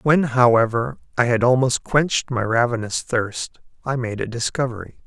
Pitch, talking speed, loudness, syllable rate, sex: 120 Hz, 155 wpm, -20 LUFS, 4.9 syllables/s, male